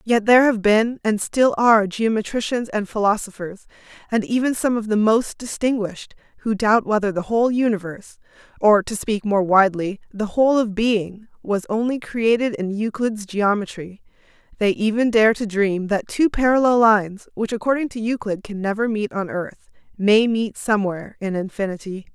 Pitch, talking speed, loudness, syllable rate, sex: 215 Hz, 165 wpm, -20 LUFS, 5.2 syllables/s, female